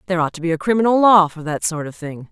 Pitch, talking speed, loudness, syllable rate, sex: 175 Hz, 310 wpm, -17 LUFS, 7.0 syllables/s, female